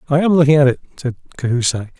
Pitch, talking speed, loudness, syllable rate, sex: 140 Hz, 210 wpm, -16 LUFS, 7.3 syllables/s, male